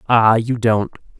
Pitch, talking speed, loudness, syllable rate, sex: 115 Hz, 150 wpm, -16 LUFS, 4.0 syllables/s, male